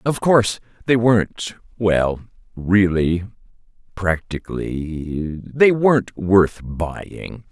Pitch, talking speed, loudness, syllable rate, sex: 100 Hz, 90 wpm, -19 LUFS, 3.1 syllables/s, male